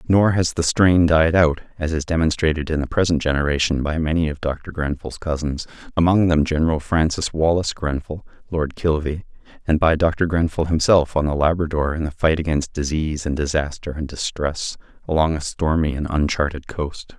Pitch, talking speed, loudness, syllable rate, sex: 80 Hz, 175 wpm, -20 LUFS, 5.3 syllables/s, male